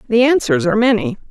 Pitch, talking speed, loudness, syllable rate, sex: 250 Hz, 185 wpm, -15 LUFS, 6.8 syllables/s, female